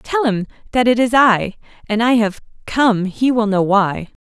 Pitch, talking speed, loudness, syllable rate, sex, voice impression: 220 Hz, 200 wpm, -16 LUFS, 4.3 syllables/s, female, feminine, adult-like, clear, intellectual, slightly friendly, elegant, slightly lively